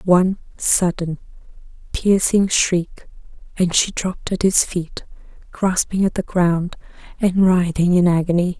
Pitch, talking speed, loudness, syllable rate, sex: 180 Hz, 125 wpm, -18 LUFS, 4.2 syllables/s, female